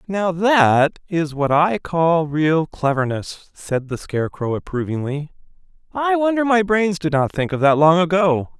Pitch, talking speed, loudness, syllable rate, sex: 165 Hz, 160 wpm, -18 LUFS, 4.2 syllables/s, male